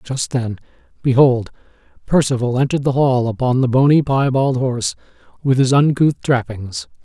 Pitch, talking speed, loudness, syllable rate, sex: 130 Hz, 135 wpm, -17 LUFS, 5.1 syllables/s, male